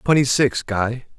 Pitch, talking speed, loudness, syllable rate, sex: 125 Hz, 150 wpm, -19 LUFS, 4.0 syllables/s, male